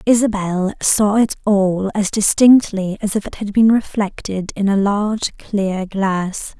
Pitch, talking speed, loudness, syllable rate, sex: 200 Hz, 155 wpm, -17 LUFS, 3.9 syllables/s, female